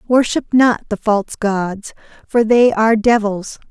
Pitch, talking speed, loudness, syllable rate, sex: 220 Hz, 145 wpm, -15 LUFS, 4.2 syllables/s, female